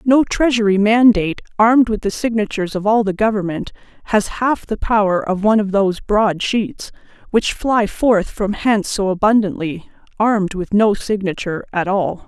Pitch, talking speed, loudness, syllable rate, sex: 210 Hz, 165 wpm, -17 LUFS, 5.1 syllables/s, female